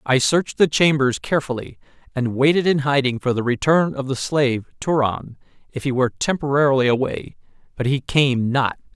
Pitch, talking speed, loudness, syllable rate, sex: 135 Hz, 170 wpm, -20 LUFS, 5.4 syllables/s, male